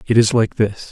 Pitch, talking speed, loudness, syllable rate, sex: 110 Hz, 260 wpm, -17 LUFS, 5.1 syllables/s, male